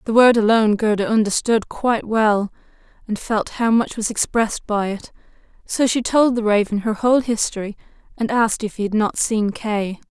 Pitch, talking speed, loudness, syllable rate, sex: 220 Hz, 185 wpm, -19 LUFS, 5.2 syllables/s, female